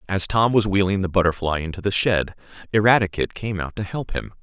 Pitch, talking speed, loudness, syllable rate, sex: 95 Hz, 205 wpm, -21 LUFS, 6.0 syllables/s, male